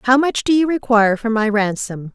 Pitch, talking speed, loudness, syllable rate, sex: 230 Hz, 225 wpm, -17 LUFS, 5.2 syllables/s, female